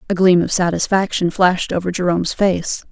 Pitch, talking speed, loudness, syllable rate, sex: 180 Hz, 165 wpm, -17 LUFS, 5.6 syllables/s, female